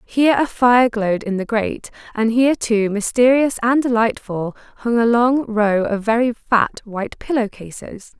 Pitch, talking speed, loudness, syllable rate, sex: 230 Hz, 170 wpm, -18 LUFS, 4.7 syllables/s, female